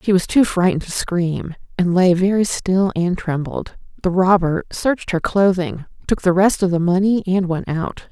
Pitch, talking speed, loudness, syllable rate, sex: 180 Hz, 190 wpm, -18 LUFS, 4.7 syllables/s, female